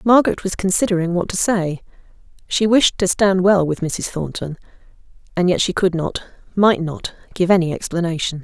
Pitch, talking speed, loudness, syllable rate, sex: 185 Hz, 170 wpm, -18 LUFS, 5.3 syllables/s, female